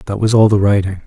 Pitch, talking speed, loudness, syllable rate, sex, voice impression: 100 Hz, 285 wpm, -13 LUFS, 6.7 syllables/s, male, masculine, middle-aged, tensed, slightly powerful, weak, slightly muffled, slightly raspy, sincere, calm, mature, slightly wild, kind, modest